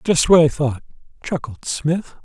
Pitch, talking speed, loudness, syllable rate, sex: 150 Hz, 160 wpm, -18 LUFS, 4.2 syllables/s, male